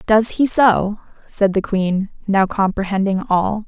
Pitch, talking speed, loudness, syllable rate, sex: 205 Hz, 145 wpm, -17 LUFS, 3.8 syllables/s, female